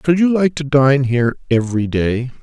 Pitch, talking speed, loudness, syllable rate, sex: 135 Hz, 200 wpm, -16 LUFS, 5.3 syllables/s, male